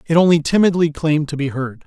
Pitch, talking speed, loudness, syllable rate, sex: 155 Hz, 225 wpm, -17 LUFS, 6.3 syllables/s, male